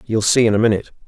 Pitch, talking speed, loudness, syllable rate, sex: 110 Hz, 280 wpm, -16 LUFS, 8.1 syllables/s, male